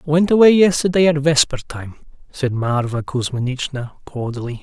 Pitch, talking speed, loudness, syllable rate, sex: 140 Hz, 115 wpm, -17 LUFS, 5.2 syllables/s, male